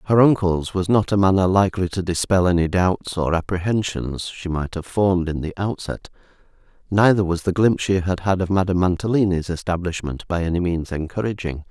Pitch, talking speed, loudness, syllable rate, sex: 90 Hz, 180 wpm, -20 LUFS, 5.6 syllables/s, male